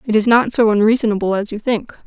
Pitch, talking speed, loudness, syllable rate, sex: 220 Hz, 230 wpm, -16 LUFS, 6.5 syllables/s, female